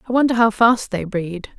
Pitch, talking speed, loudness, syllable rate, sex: 215 Hz, 225 wpm, -18 LUFS, 5.4 syllables/s, female